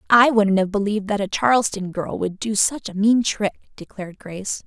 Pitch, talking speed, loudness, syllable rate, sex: 205 Hz, 205 wpm, -20 LUFS, 5.5 syllables/s, female